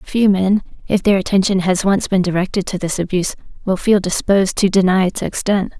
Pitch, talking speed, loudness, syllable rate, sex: 190 Hz, 195 wpm, -16 LUFS, 5.6 syllables/s, female